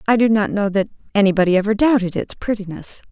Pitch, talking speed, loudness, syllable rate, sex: 205 Hz, 195 wpm, -18 LUFS, 6.4 syllables/s, female